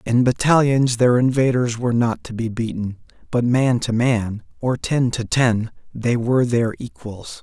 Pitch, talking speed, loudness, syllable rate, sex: 120 Hz, 170 wpm, -19 LUFS, 4.4 syllables/s, male